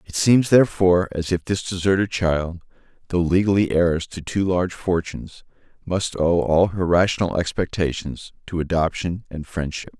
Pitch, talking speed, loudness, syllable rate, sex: 90 Hz, 150 wpm, -21 LUFS, 5.0 syllables/s, male